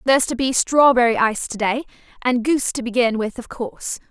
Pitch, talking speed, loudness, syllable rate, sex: 245 Hz, 190 wpm, -19 LUFS, 6.1 syllables/s, female